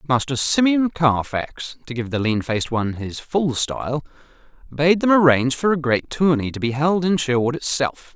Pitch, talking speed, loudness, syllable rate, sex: 145 Hz, 185 wpm, -20 LUFS, 5.0 syllables/s, male